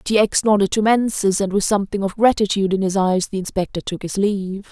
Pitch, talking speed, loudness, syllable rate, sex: 200 Hz, 230 wpm, -19 LUFS, 6.1 syllables/s, female